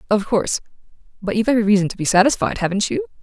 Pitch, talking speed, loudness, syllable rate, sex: 210 Hz, 185 wpm, -18 LUFS, 8.4 syllables/s, female